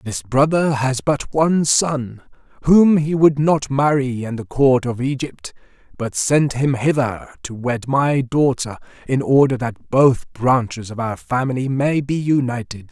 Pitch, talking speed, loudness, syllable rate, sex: 135 Hz, 165 wpm, -18 LUFS, 4.1 syllables/s, male